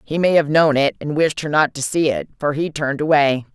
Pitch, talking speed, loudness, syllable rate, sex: 150 Hz, 270 wpm, -18 LUFS, 5.6 syllables/s, female